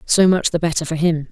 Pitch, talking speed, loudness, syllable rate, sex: 165 Hz, 275 wpm, -17 LUFS, 5.8 syllables/s, female